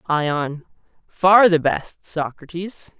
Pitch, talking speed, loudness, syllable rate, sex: 165 Hz, 100 wpm, -19 LUFS, 2.9 syllables/s, male